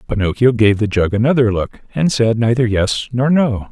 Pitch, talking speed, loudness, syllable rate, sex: 115 Hz, 195 wpm, -15 LUFS, 5.0 syllables/s, male